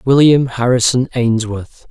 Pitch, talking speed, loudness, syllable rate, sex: 125 Hz, 95 wpm, -14 LUFS, 4.0 syllables/s, male